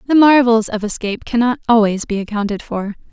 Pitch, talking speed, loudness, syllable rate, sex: 225 Hz, 175 wpm, -16 LUFS, 5.9 syllables/s, female